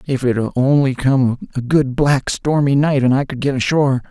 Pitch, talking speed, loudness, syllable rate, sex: 135 Hz, 220 wpm, -16 LUFS, 5.0 syllables/s, male